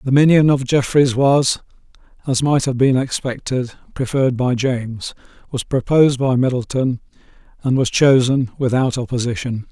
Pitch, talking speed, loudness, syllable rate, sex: 130 Hz, 135 wpm, -17 LUFS, 5.0 syllables/s, male